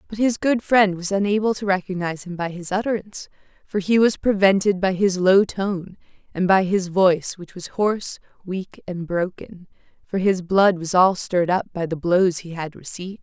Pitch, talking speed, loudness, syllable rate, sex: 190 Hz, 195 wpm, -21 LUFS, 5.0 syllables/s, female